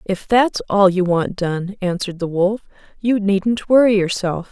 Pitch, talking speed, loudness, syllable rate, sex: 195 Hz, 175 wpm, -18 LUFS, 4.2 syllables/s, female